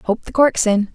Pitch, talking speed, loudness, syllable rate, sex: 225 Hz, 255 wpm, -17 LUFS, 4.4 syllables/s, female